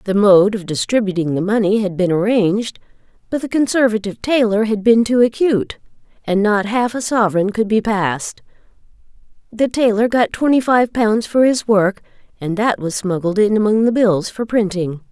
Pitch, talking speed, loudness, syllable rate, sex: 215 Hz, 175 wpm, -16 LUFS, 5.2 syllables/s, female